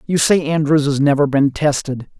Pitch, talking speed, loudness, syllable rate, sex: 145 Hz, 190 wpm, -16 LUFS, 5.1 syllables/s, male